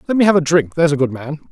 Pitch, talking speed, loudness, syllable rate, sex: 155 Hz, 360 wpm, -15 LUFS, 7.8 syllables/s, male